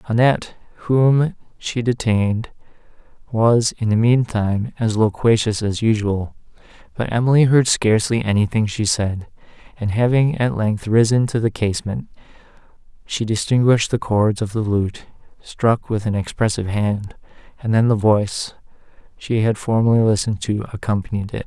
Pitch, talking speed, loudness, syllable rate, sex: 110 Hz, 145 wpm, -19 LUFS, 5.0 syllables/s, male